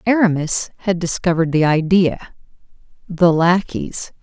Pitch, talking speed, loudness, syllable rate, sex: 175 Hz, 100 wpm, -17 LUFS, 4.4 syllables/s, female